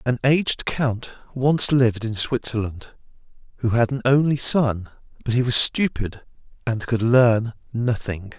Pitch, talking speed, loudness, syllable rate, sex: 120 Hz, 145 wpm, -21 LUFS, 4.3 syllables/s, male